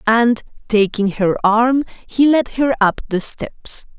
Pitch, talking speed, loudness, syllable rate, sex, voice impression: 230 Hz, 150 wpm, -17 LUFS, 3.5 syllables/s, female, very feminine, slightly young, adult-like, very thin, tensed, slightly powerful, bright, hard, very clear, fluent, slightly cute, intellectual, slightly refreshing, very sincere, calm, slightly friendly, slightly reassuring, unique, elegant, slightly wild, slightly sweet, slightly strict, slightly intense, slightly sharp